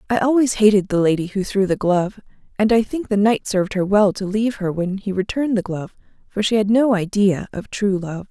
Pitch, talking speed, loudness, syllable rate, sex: 205 Hz, 240 wpm, -19 LUFS, 5.9 syllables/s, female